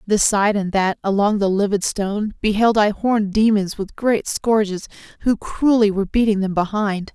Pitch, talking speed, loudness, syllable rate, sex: 205 Hz, 175 wpm, -19 LUFS, 4.9 syllables/s, female